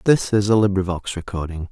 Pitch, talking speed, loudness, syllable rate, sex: 100 Hz, 175 wpm, -20 LUFS, 5.8 syllables/s, male